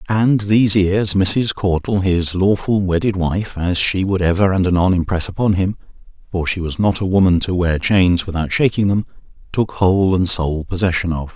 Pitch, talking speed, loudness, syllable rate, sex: 95 Hz, 180 wpm, -17 LUFS, 5.0 syllables/s, male